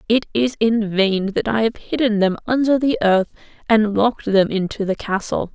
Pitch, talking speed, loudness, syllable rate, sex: 215 Hz, 195 wpm, -19 LUFS, 4.8 syllables/s, female